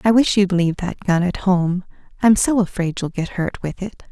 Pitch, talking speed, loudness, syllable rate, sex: 190 Hz, 235 wpm, -19 LUFS, 5.1 syllables/s, female